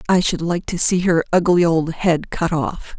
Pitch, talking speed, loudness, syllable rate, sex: 170 Hz, 220 wpm, -18 LUFS, 4.4 syllables/s, female